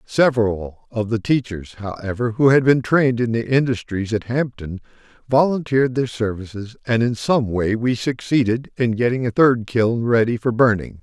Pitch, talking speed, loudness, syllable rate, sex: 120 Hz, 170 wpm, -19 LUFS, 4.9 syllables/s, male